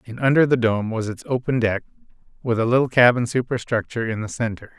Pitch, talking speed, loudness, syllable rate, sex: 120 Hz, 200 wpm, -21 LUFS, 6.1 syllables/s, male